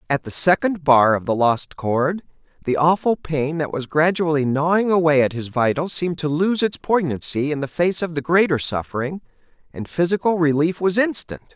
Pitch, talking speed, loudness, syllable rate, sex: 155 Hz, 185 wpm, -20 LUFS, 5.2 syllables/s, male